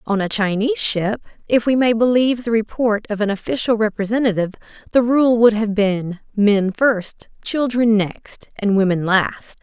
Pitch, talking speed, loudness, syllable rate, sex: 220 Hz, 160 wpm, -18 LUFS, 4.7 syllables/s, female